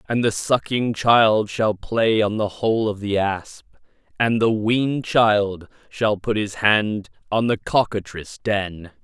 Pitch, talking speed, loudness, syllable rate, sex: 105 Hz, 160 wpm, -20 LUFS, 3.7 syllables/s, male